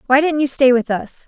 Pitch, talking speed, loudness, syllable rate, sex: 265 Hz, 280 wpm, -16 LUFS, 5.4 syllables/s, female